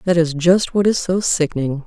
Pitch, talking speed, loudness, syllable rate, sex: 170 Hz, 225 wpm, -17 LUFS, 5.1 syllables/s, female